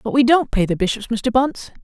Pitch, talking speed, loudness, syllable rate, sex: 235 Hz, 260 wpm, -18 LUFS, 6.1 syllables/s, female